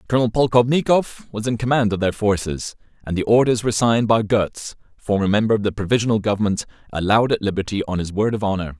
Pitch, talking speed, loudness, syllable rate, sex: 110 Hz, 200 wpm, -19 LUFS, 6.7 syllables/s, male